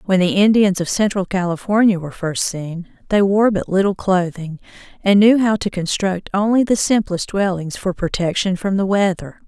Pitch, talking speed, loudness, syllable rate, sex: 190 Hz, 175 wpm, -17 LUFS, 5.0 syllables/s, female